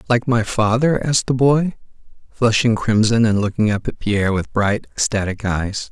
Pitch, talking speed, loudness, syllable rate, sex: 110 Hz, 175 wpm, -18 LUFS, 4.9 syllables/s, male